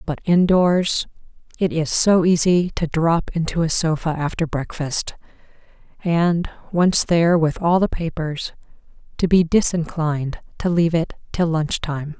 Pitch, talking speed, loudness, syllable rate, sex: 165 Hz, 145 wpm, -20 LUFS, 4.3 syllables/s, female